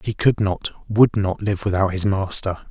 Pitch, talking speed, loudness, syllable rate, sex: 100 Hz, 200 wpm, -20 LUFS, 4.3 syllables/s, male